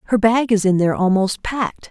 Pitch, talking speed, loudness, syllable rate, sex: 210 Hz, 220 wpm, -17 LUFS, 6.0 syllables/s, female